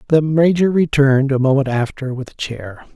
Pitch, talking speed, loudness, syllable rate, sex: 140 Hz, 185 wpm, -16 LUFS, 5.2 syllables/s, male